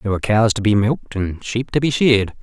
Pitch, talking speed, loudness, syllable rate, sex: 110 Hz, 275 wpm, -18 LUFS, 6.4 syllables/s, male